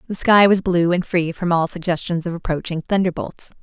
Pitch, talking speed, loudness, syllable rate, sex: 175 Hz, 200 wpm, -19 LUFS, 5.5 syllables/s, female